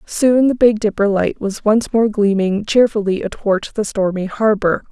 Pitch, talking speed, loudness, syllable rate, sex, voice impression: 210 Hz, 170 wpm, -16 LUFS, 4.5 syllables/s, female, slightly gender-neutral, slightly young, slightly muffled, calm, kind, slightly modest